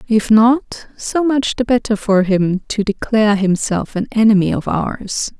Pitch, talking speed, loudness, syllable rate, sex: 215 Hz, 165 wpm, -16 LUFS, 4.2 syllables/s, female